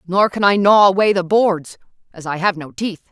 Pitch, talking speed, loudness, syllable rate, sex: 185 Hz, 230 wpm, -16 LUFS, 4.9 syllables/s, female